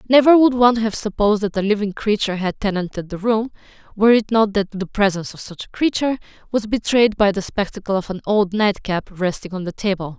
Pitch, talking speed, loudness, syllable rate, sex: 210 Hz, 210 wpm, -19 LUFS, 6.2 syllables/s, female